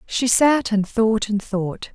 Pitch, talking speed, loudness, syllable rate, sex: 220 Hz, 185 wpm, -19 LUFS, 3.3 syllables/s, female